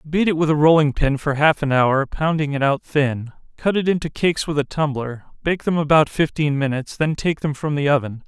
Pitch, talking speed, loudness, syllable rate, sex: 150 Hz, 220 wpm, -19 LUFS, 5.4 syllables/s, male